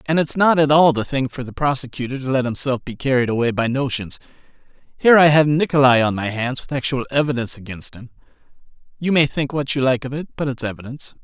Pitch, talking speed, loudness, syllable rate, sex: 135 Hz, 215 wpm, -19 LUFS, 6.4 syllables/s, male